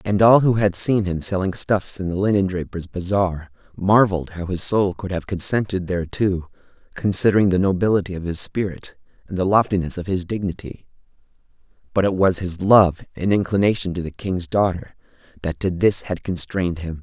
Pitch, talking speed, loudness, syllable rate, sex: 95 Hz, 175 wpm, -20 LUFS, 5.4 syllables/s, male